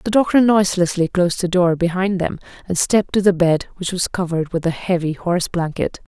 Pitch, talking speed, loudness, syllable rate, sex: 180 Hz, 205 wpm, -18 LUFS, 6.0 syllables/s, female